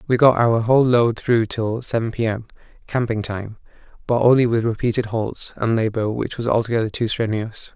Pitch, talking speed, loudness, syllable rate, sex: 115 Hz, 185 wpm, -20 LUFS, 5.3 syllables/s, male